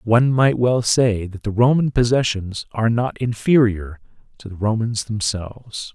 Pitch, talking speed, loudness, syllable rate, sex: 115 Hz, 150 wpm, -19 LUFS, 4.6 syllables/s, male